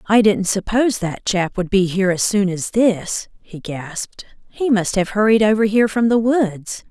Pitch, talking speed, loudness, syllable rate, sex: 205 Hz, 200 wpm, -18 LUFS, 4.7 syllables/s, female